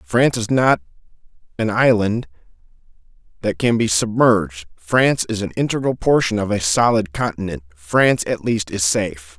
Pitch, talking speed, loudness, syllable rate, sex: 105 Hz, 145 wpm, -18 LUFS, 5.1 syllables/s, male